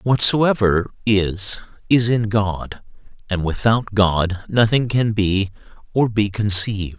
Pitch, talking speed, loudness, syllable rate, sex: 105 Hz, 120 wpm, -19 LUFS, 3.6 syllables/s, male